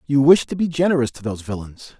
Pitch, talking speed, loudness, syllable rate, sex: 135 Hz, 240 wpm, -19 LUFS, 6.7 syllables/s, male